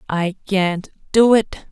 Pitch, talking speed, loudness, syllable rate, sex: 195 Hz, 140 wpm, -17 LUFS, 3.3 syllables/s, female